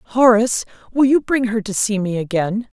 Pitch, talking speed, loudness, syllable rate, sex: 220 Hz, 195 wpm, -18 LUFS, 5.0 syllables/s, female